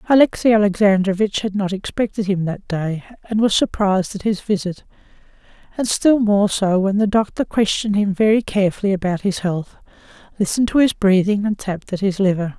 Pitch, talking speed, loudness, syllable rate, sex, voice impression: 200 Hz, 175 wpm, -18 LUFS, 5.7 syllables/s, female, very feminine, very adult-like, slightly old, very thin, slightly tensed, weak, dark, soft, slightly muffled, slightly fluent, slightly cute, very intellectual, refreshing, very sincere, very calm, very friendly, very reassuring, unique, very elegant, sweet, very kind, slightly sharp, modest